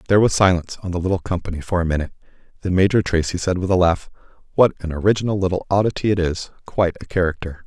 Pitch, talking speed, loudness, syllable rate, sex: 90 Hz, 205 wpm, -20 LUFS, 7.5 syllables/s, male